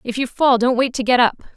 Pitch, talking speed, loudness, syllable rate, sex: 250 Hz, 310 wpm, -17 LUFS, 5.6 syllables/s, female